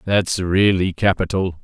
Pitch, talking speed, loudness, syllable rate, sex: 95 Hz, 110 wpm, -18 LUFS, 4.0 syllables/s, male